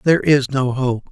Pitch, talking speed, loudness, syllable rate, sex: 135 Hz, 215 wpm, -17 LUFS, 5.1 syllables/s, male